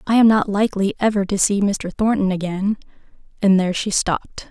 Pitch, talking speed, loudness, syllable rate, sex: 200 Hz, 175 wpm, -19 LUFS, 5.7 syllables/s, female